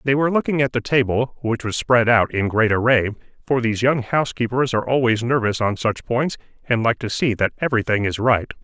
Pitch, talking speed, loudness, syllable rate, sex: 120 Hz, 215 wpm, -20 LUFS, 5.2 syllables/s, male